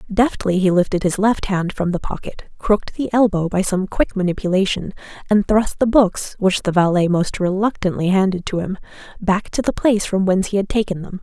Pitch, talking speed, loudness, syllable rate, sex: 195 Hz, 205 wpm, -18 LUFS, 5.4 syllables/s, female